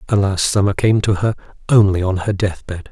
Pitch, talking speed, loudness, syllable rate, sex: 100 Hz, 185 wpm, -17 LUFS, 5.4 syllables/s, male